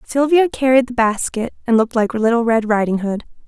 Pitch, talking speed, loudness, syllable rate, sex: 235 Hz, 190 wpm, -17 LUFS, 5.6 syllables/s, female